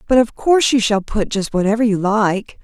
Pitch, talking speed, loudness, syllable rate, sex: 220 Hz, 230 wpm, -16 LUFS, 5.3 syllables/s, female